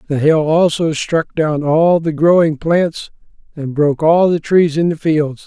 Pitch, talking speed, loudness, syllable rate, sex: 160 Hz, 185 wpm, -14 LUFS, 4.1 syllables/s, male